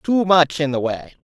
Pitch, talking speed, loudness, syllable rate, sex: 160 Hz, 245 wpm, -18 LUFS, 4.4 syllables/s, female